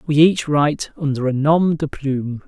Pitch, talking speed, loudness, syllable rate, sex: 145 Hz, 195 wpm, -18 LUFS, 4.9 syllables/s, male